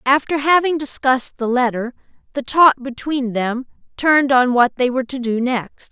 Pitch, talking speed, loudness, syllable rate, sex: 260 Hz, 170 wpm, -17 LUFS, 4.9 syllables/s, female